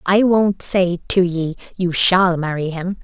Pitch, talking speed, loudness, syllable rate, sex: 180 Hz, 180 wpm, -17 LUFS, 3.8 syllables/s, female